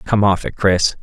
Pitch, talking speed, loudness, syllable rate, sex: 100 Hz, 235 wpm, -16 LUFS, 4.5 syllables/s, male